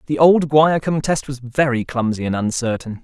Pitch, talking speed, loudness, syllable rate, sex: 135 Hz, 180 wpm, -18 LUFS, 4.9 syllables/s, male